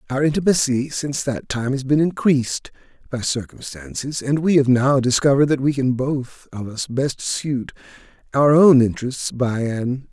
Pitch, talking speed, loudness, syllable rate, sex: 135 Hz, 165 wpm, -19 LUFS, 4.7 syllables/s, male